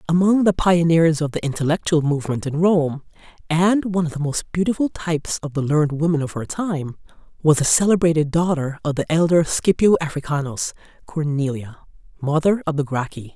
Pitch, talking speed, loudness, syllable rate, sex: 160 Hz, 160 wpm, -20 LUFS, 5.7 syllables/s, female